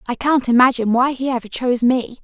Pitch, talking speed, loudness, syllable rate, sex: 250 Hz, 215 wpm, -17 LUFS, 6.3 syllables/s, female